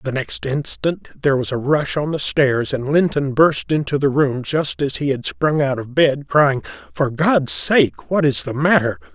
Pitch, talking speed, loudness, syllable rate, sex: 145 Hz, 210 wpm, -18 LUFS, 4.3 syllables/s, male